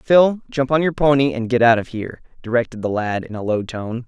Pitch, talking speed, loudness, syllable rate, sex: 125 Hz, 250 wpm, -19 LUFS, 5.6 syllables/s, male